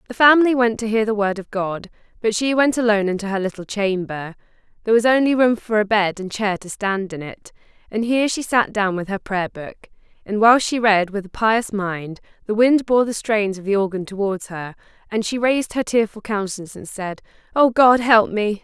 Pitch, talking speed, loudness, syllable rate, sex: 215 Hz, 220 wpm, -19 LUFS, 5.5 syllables/s, female